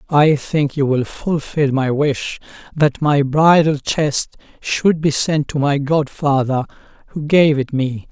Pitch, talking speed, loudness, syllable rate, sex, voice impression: 145 Hz, 155 wpm, -17 LUFS, 3.7 syllables/s, male, very masculine, old, thick, tensed, slightly powerful, slightly bright, slightly soft, clear, fluent, raspy, cool, intellectual, slightly refreshing, sincere, calm, very mature, slightly friendly, slightly reassuring, slightly unique, slightly elegant, wild, slightly sweet, slightly lively, kind, modest